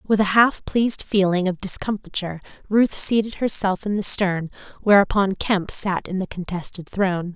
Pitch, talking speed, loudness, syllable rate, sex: 195 Hz, 165 wpm, -20 LUFS, 4.9 syllables/s, female